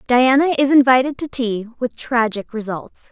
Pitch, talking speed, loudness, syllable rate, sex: 250 Hz, 155 wpm, -17 LUFS, 4.6 syllables/s, female